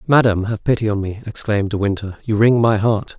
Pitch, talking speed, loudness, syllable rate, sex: 110 Hz, 225 wpm, -18 LUFS, 6.1 syllables/s, male